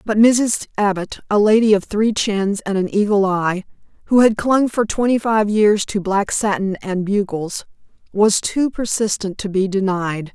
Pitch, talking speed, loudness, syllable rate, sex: 205 Hz, 175 wpm, -18 LUFS, 4.3 syllables/s, female